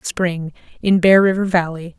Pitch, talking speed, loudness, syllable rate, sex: 180 Hz, 120 wpm, -16 LUFS, 4.4 syllables/s, female